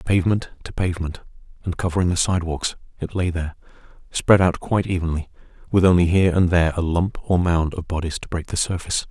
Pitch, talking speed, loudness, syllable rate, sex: 90 Hz, 200 wpm, -21 LUFS, 6.6 syllables/s, male